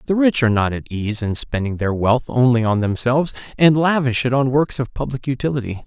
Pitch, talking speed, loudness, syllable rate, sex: 125 Hz, 215 wpm, -19 LUFS, 5.7 syllables/s, male